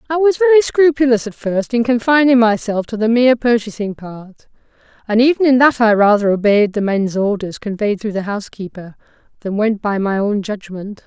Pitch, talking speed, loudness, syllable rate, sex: 225 Hz, 185 wpm, -15 LUFS, 5.3 syllables/s, female